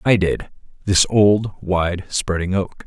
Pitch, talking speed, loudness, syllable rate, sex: 95 Hz, 145 wpm, -19 LUFS, 3.5 syllables/s, male